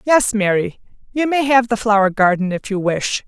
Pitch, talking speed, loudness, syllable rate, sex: 215 Hz, 200 wpm, -17 LUFS, 5.0 syllables/s, female